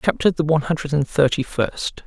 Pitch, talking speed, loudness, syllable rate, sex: 145 Hz, 205 wpm, -20 LUFS, 5.6 syllables/s, male